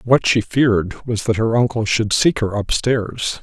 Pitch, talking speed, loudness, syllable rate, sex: 115 Hz, 210 wpm, -18 LUFS, 4.2 syllables/s, male